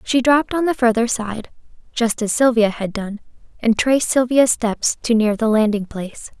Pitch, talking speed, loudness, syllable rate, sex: 230 Hz, 190 wpm, -18 LUFS, 5.0 syllables/s, female